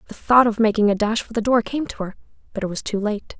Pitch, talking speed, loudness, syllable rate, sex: 220 Hz, 300 wpm, -20 LUFS, 6.4 syllables/s, female